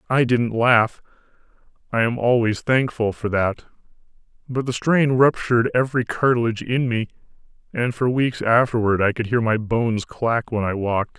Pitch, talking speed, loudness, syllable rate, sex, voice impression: 115 Hz, 150 wpm, -20 LUFS, 5.0 syllables/s, male, masculine, thick, tensed, powerful, clear, halting, intellectual, friendly, wild, lively, kind